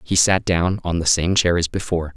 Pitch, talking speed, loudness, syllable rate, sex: 90 Hz, 250 wpm, -19 LUFS, 5.5 syllables/s, male